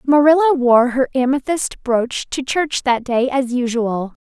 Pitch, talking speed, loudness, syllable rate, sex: 260 Hz, 155 wpm, -17 LUFS, 4.0 syllables/s, female